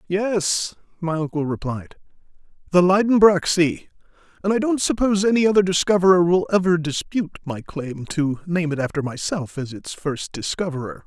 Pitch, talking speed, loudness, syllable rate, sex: 170 Hz, 150 wpm, -21 LUFS, 5.1 syllables/s, male